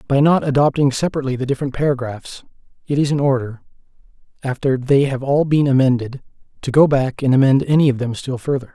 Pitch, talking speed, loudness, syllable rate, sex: 135 Hz, 185 wpm, -17 LUFS, 6.3 syllables/s, male